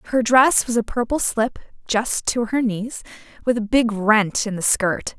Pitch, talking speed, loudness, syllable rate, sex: 225 Hz, 195 wpm, -20 LUFS, 4.0 syllables/s, female